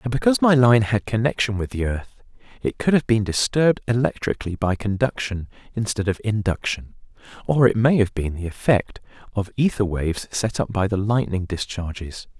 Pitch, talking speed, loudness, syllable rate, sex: 110 Hz, 175 wpm, -22 LUFS, 5.4 syllables/s, male